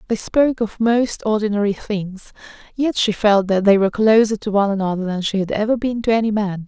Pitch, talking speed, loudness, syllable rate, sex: 210 Hz, 215 wpm, -18 LUFS, 5.8 syllables/s, female